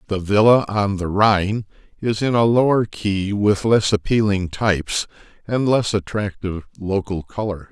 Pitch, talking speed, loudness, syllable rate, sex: 105 Hz, 150 wpm, -19 LUFS, 4.5 syllables/s, male